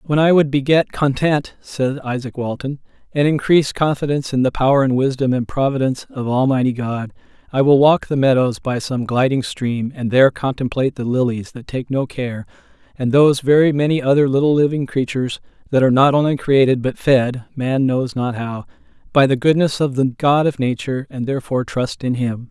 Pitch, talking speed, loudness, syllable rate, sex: 135 Hz, 190 wpm, -17 LUFS, 5.5 syllables/s, male